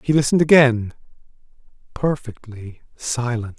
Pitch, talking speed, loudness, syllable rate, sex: 125 Hz, 85 wpm, -18 LUFS, 4.7 syllables/s, male